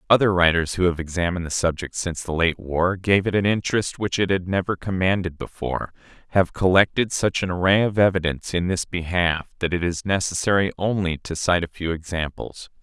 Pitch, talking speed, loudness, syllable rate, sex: 90 Hz, 190 wpm, -22 LUFS, 5.7 syllables/s, male